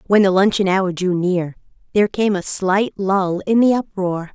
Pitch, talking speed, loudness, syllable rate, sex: 195 Hz, 195 wpm, -18 LUFS, 4.6 syllables/s, female